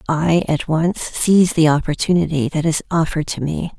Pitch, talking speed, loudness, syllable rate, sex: 160 Hz, 175 wpm, -17 LUFS, 5.2 syllables/s, female